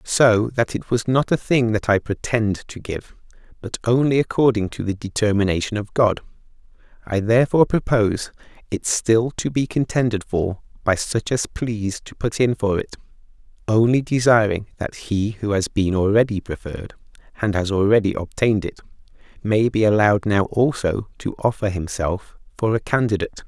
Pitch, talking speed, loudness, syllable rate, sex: 110 Hz, 160 wpm, -20 LUFS, 5.2 syllables/s, male